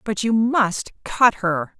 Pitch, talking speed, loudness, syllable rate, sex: 210 Hz, 165 wpm, -19 LUFS, 3.2 syllables/s, female